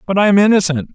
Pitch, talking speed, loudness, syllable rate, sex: 190 Hz, 255 wpm, -13 LUFS, 7.6 syllables/s, male